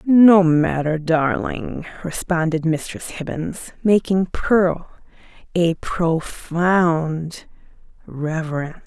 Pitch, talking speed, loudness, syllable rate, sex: 165 Hz, 75 wpm, -19 LUFS, 3.1 syllables/s, female